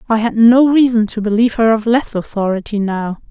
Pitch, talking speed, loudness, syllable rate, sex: 225 Hz, 200 wpm, -14 LUFS, 5.5 syllables/s, female